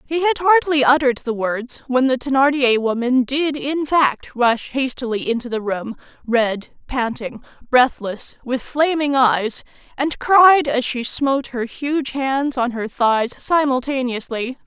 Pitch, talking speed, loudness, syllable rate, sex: 260 Hz, 145 wpm, -19 LUFS, 4.0 syllables/s, female